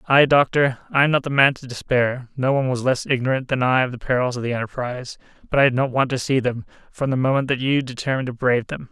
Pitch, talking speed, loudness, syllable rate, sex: 130 Hz, 255 wpm, -20 LUFS, 6.5 syllables/s, male